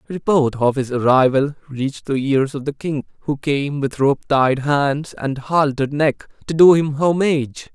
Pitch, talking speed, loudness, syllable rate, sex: 140 Hz, 180 wpm, -18 LUFS, 4.5 syllables/s, male